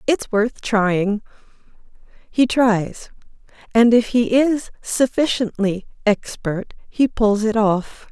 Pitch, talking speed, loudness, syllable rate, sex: 220 Hz, 110 wpm, -19 LUFS, 3.2 syllables/s, female